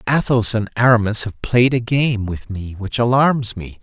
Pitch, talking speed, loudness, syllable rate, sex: 115 Hz, 190 wpm, -17 LUFS, 4.5 syllables/s, male